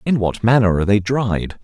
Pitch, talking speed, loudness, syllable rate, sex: 105 Hz, 220 wpm, -17 LUFS, 5.3 syllables/s, male